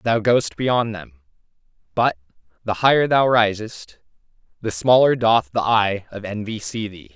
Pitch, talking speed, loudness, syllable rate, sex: 110 Hz, 150 wpm, -19 LUFS, 4.3 syllables/s, male